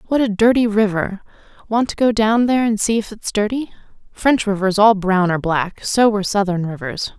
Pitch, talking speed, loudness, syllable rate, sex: 210 Hz, 185 wpm, -17 LUFS, 5.2 syllables/s, female